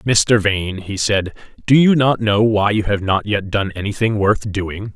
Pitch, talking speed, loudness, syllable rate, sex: 105 Hz, 205 wpm, -17 LUFS, 4.2 syllables/s, male